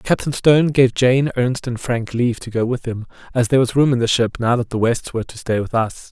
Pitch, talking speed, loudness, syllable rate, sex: 120 Hz, 275 wpm, -18 LUFS, 5.9 syllables/s, male